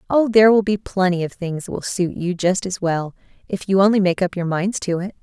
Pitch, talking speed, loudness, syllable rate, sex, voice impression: 190 Hz, 265 wpm, -19 LUFS, 5.6 syllables/s, female, very feminine, slightly young, adult-like, thin, slightly tensed, slightly powerful, bright, slightly soft, clear, fluent, slightly raspy, very cute, intellectual, very refreshing, sincere, calm, friendly, very reassuring, unique, very elegant, slightly wild, very sweet, slightly lively, very kind, modest, light